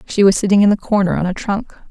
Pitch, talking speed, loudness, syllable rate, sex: 195 Hz, 285 wpm, -16 LUFS, 6.6 syllables/s, female